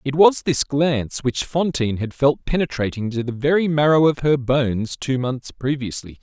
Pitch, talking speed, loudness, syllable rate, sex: 135 Hz, 185 wpm, -20 LUFS, 5.0 syllables/s, male